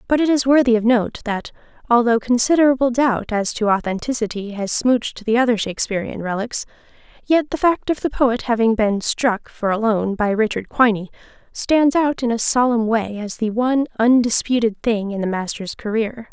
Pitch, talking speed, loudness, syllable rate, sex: 230 Hz, 180 wpm, -19 LUFS, 5.1 syllables/s, female